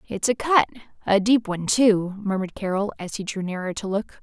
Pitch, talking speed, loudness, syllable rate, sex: 205 Hz, 200 wpm, -23 LUFS, 5.6 syllables/s, female